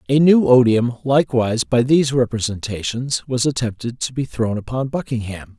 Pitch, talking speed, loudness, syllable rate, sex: 120 Hz, 150 wpm, -18 LUFS, 5.3 syllables/s, male